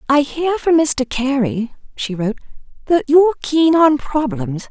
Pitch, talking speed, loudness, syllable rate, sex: 275 Hz, 155 wpm, -16 LUFS, 4.2 syllables/s, female